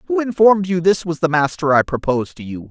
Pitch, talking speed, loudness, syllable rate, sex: 165 Hz, 245 wpm, -17 LUFS, 6.3 syllables/s, male